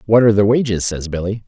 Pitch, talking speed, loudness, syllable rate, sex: 105 Hz, 245 wpm, -16 LUFS, 6.8 syllables/s, male